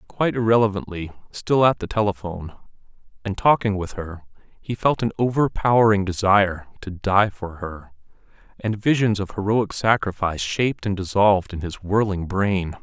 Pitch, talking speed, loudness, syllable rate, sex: 100 Hz, 145 wpm, -21 LUFS, 5.2 syllables/s, male